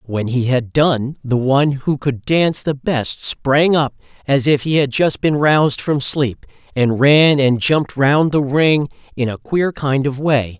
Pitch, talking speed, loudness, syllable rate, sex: 140 Hz, 200 wpm, -16 LUFS, 4.1 syllables/s, male